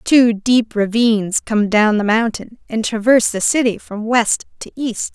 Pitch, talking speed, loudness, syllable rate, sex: 225 Hz, 175 wpm, -16 LUFS, 4.4 syllables/s, female